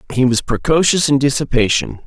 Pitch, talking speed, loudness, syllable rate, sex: 140 Hz, 145 wpm, -15 LUFS, 5.5 syllables/s, male